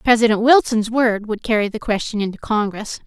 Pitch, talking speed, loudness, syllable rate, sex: 220 Hz, 175 wpm, -18 LUFS, 5.4 syllables/s, female